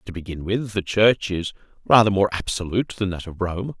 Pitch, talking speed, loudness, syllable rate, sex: 95 Hz, 205 wpm, -22 LUFS, 5.5 syllables/s, male